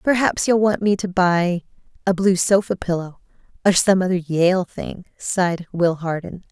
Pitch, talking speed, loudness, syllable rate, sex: 185 Hz, 165 wpm, -19 LUFS, 4.6 syllables/s, female